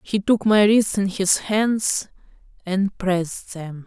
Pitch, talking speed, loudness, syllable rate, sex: 195 Hz, 155 wpm, -20 LUFS, 3.4 syllables/s, female